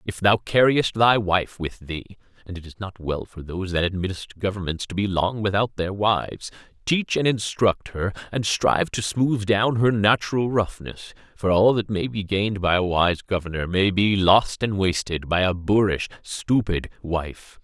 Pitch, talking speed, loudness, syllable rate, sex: 100 Hz, 185 wpm, -22 LUFS, 3.4 syllables/s, male